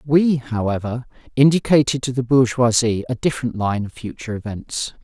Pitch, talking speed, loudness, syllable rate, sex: 125 Hz, 145 wpm, -19 LUFS, 5.4 syllables/s, male